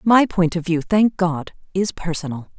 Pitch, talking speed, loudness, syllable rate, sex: 175 Hz, 185 wpm, -20 LUFS, 4.4 syllables/s, female